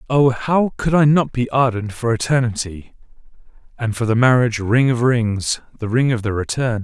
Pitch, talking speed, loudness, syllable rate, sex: 120 Hz, 175 wpm, -18 LUFS, 5.0 syllables/s, male